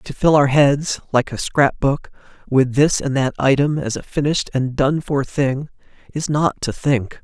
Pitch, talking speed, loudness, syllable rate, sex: 140 Hz, 190 wpm, -18 LUFS, 4.3 syllables/s, male